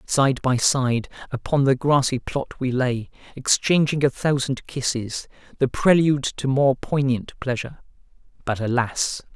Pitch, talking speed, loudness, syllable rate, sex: 130 Hz, 135 wpm, -22 LUFS, 4.3 syllables/s, male